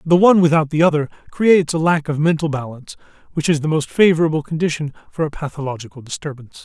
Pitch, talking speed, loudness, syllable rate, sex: 155 Hz, 190 wpm, -17 LUFS, 6.9 syllables/s, male